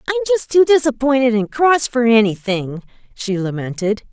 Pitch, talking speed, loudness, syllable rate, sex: 245 Hz, 145 wpm, -16 LUFS, 5.0 syllables/s, female